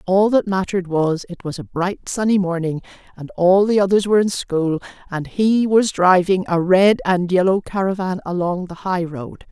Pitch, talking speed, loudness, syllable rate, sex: 185 Hz, 190 wpm, -18 LUFS, 4.8 syllables/s, female